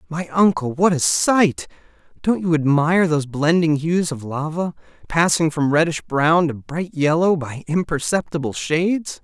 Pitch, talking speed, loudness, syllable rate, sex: 160 Hz, 150 wpm, -19 LUFS, 4.6 syllables/s, male